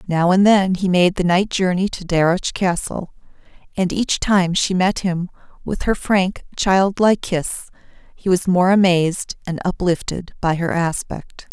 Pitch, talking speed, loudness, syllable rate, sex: 185 Hz, 160 wpm, -18 LUFS, 4.4 syllables/s, female